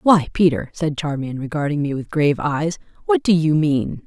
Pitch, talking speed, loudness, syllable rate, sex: 155 Hz, 190 wpm, -20 LUFS, 4.9 syllables/s, female